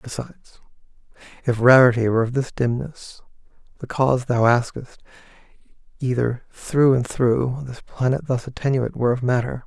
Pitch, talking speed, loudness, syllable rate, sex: 125 Hz, 135 wpm, -20 LUFS, 5.2 syllables/s, male